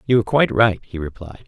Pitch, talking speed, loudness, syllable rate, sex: 105 Hz, 245 wpm, -18 LUFS, 7.3 syllables/s, male